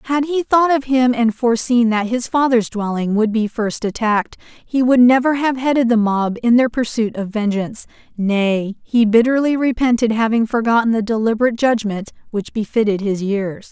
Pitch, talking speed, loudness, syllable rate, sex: 230 Hz, 175 wpm, -17 LUFS, 5.1 syllables/s, female